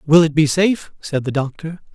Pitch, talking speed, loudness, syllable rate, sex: 155 Hz, 215 wpm, -18 LUFS, 5.5 syllables/s, male